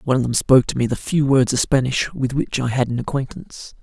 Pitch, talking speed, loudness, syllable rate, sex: 130 Hz, 265 wpm, -19 LUFS, 6.2 syllables/s, male